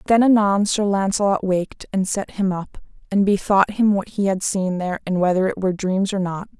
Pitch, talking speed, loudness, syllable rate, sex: 195 Hz, 220 wpm, -20 LUFS, 5.4 syllables/s, female